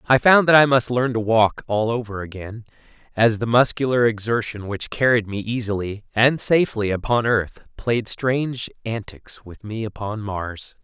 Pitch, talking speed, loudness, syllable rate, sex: 115 Hz, 165 wpm, -20 LUFS, 4.6 syllables/s, male